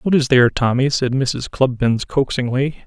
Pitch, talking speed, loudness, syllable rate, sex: 130 Hz, 170 wpm, -17 LUFS, 5.2 syllables/s, male